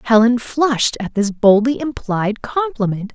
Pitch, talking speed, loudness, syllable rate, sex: 230 Hz, 135 wpm, -17 LUFS, 4.3 syllables/s, female